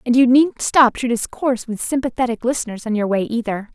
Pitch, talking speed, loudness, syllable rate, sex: 240 Hz, 210 wpm, -18 LUFS, 5.8 syllables/s, female